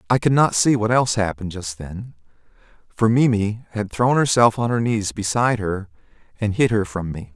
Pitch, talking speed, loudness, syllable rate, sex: 110 Hz, 195 wpm, -20 LUFS, 5.4 syllables/s, male